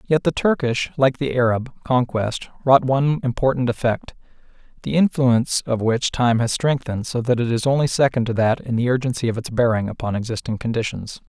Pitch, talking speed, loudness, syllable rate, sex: 125 Hz, 185 wpm, -20 LUFS, 5.6 syllables/s, male